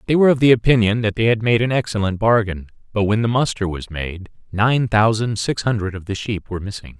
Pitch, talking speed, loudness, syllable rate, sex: 110 Hz, 230 wpm, -19 LUFS, 6.0 syllables/s, male